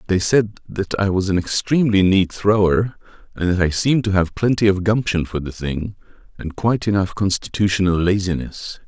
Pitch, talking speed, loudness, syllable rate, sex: 95 Hz, 175 wpm, -19 LUFS, 5.3 syllables/s, male